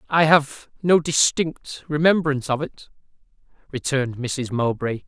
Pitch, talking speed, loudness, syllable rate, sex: 145 Hz, 120 wpm, -21 LUFS, 4.3 syllables/s, male